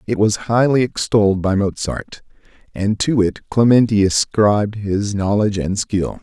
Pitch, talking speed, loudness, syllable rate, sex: 105 Hz, 145 wpm, -17 LUFS, 4.5 syllables/s, male